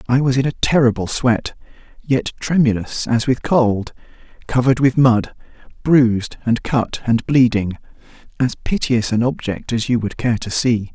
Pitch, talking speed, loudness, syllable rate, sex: 120 Hz, 150 wpm, -18 LUFS, 4.7 syllables/s, male